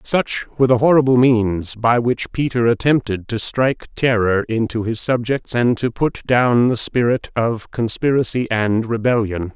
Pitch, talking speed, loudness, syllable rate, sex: 120 Hz, 155 wpm, -18 LUFS, 4.4 syllables/s, male